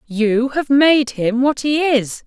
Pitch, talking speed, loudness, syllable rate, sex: 260 Hz, 185 wpm, -16 LUFS, 3.3 syllables/s, female